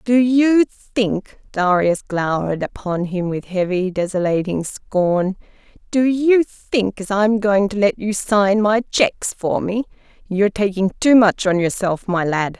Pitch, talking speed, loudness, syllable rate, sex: 200 Hz, 150 wpm, -18 LUFS, 4.3 syllables/s, female